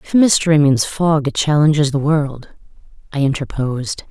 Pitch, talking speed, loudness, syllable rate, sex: 145 Hz, 145 wpm, -16 LUFS, 5.0 syllables/s, female